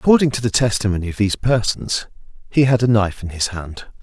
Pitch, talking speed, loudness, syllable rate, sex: 110 Hz, 210 wpm, -18 LUFS, 6.3 syllables/s, male